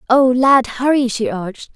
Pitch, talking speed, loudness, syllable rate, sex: 245 Hz, 170 wpm, -15 LUFS, 4.6 syllables/s, female